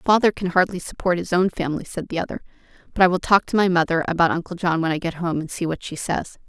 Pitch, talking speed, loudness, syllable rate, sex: 175 Hz, 270 wpm, -21 LUFS, 6.5 syllables/s, female